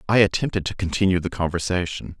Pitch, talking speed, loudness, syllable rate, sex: 95 Hz, 165 wpm, -22 LUFS, 6.4 syllables/s, male